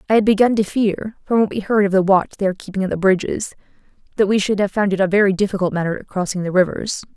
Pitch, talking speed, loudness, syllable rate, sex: 195 Hz, 260 wpm, -18 LUFS, 6.8 syllables/s, female